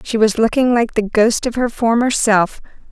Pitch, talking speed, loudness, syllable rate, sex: 225 Hz, 205 wpm, -16 LUFS, 4.7 syllables/s, female